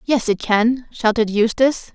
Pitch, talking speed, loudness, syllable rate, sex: 230 Hz, 155 wpm, -18 LUFS, 4.4 syllables/s, female